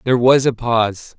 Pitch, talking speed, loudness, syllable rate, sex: 120 Hz, 200 wpm, -16 LUFS, 5.6 syllables/s, male